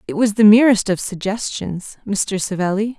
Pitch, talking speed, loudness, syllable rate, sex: 205 Hz, 160 wpm, -17 LUFS, 4.7 syllables/s, female